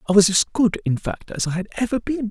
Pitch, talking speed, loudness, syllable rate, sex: 215 Hz, 285 wpm, -21 LUFS, 6.1 syllables/s, male